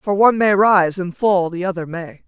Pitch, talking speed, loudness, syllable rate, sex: 190 Hz, 240 wpm, -16 LUFS, 5.1 syllables/s, female